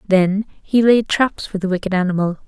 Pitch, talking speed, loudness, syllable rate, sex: 200 Hz, 195 wpm, -18 LUFS, 5.0 syllables/s, female